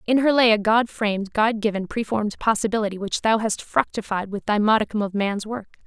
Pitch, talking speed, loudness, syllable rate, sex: 215 Hz, 185 wpm, -22 LUFS, 5.8 syllables/s, female